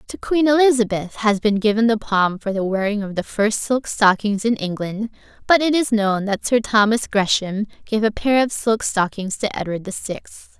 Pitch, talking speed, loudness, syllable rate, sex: 215 Hz, 205 wpm, -19 LUFS, 4.7 syllables/s, female